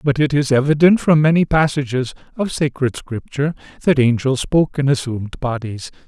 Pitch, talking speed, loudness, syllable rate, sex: 140 Hz, 160 wpm, -17 LUFS, 5.5 syllables/s, male